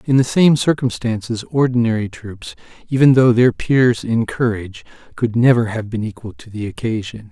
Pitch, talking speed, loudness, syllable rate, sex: 115 Hz, 165 wpm, -17 LUFS, 5.1 syllables/s, male